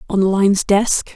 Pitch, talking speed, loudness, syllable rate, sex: 200 Hz, 155 wpm, -16 LUFS, 4.2 syllables/s, female